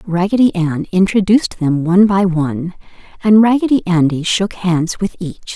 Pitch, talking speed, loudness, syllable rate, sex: 185 Hz, 150 wpm, -14 LUFS, 5.1 syllables/s, female